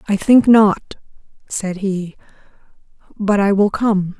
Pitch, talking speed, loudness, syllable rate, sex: 200 Hz, 130 wpm, -16 LUFS, 3.6 syllables/s, female